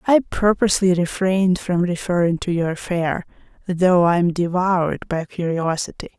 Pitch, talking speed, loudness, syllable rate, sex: 180 Hz, 135 wpm, -20 LUFS, 4.8 syllables/s, female